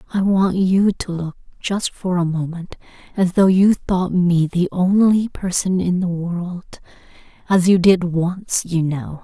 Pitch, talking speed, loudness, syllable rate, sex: 180 Hz, 165 wpm, -18 LUFS, 3.9 syllables/s, female